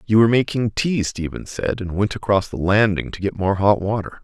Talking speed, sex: 225 wpm, male